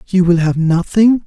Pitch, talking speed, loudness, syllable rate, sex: 185 Hz, 190 wpm, -13 LUFS, 4.4 syllables/s, male